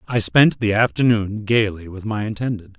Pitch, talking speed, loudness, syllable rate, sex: 105 Hz, 170 wpm, -19 LUFS, 5.0 syllables/s, male